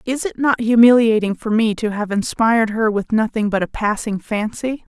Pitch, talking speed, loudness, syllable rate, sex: 220 Hz, 195 wpm, -17 LUFS, 5.0 syllables/s, female